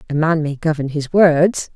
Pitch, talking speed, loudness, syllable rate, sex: 155 Hz, 205 wpm, -16 LUFS, 4.5 syllables/s, female